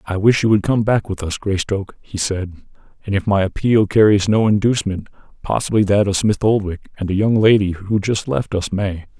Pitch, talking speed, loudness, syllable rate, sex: 100 Hz, 210 wpm, -17 LUFS, 5.5 syllables/s, male